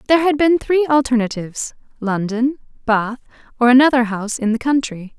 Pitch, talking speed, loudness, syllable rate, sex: 250 Hz, 150 wpm, -17 LUFS, 5.7 syllables/s, female